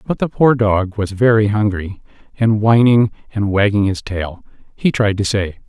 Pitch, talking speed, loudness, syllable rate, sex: 105 Hz, 180 wpm, -16 LUFS, 4.7 syllables/s, male